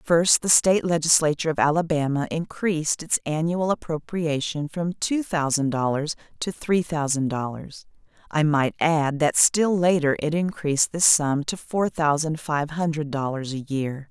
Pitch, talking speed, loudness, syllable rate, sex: 155 Hz, 155 wpm, -23 LUFS, 4.5 syllables/s, female